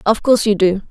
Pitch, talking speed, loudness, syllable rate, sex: 205 Hz, 265 wpm, -14 LUFS, 6.9 syllables/s, female